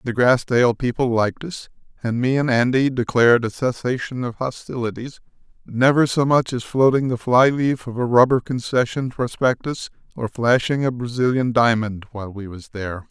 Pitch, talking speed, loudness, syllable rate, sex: 125 Hz, 165 wpm, -20 LUFS, 5.2 syllables/s, male